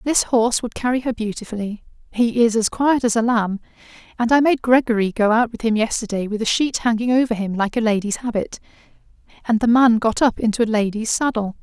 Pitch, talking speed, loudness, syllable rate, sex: 230 Hz, 210 wpm, -19 LUFS, 5.8 syllables/s, female